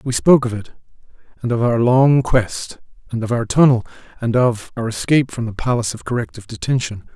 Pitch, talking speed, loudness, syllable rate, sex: 120 Hz, 195 wpm, -18 LUFS, 6.0 syllables/s, male